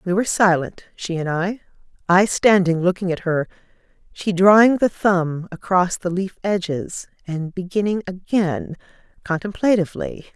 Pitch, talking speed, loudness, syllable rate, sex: 185 Hz, 135 wpm, -20 LUFS, 4.6 syllables/s, female